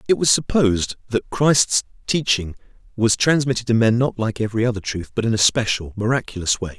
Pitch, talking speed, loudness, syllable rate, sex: 115 Hz, 185 wpm, -19 LUFS, 5.8 syllables/s, male